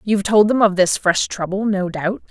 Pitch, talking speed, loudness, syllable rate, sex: 195 Hz, 235 wpm, -17 LUFS, 5.1 syllables/s, female